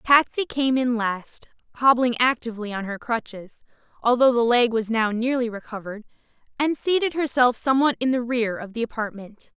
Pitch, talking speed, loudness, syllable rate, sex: 240 Hz, 165 wpm, -22 LUFS, 5.3 syllables/s, female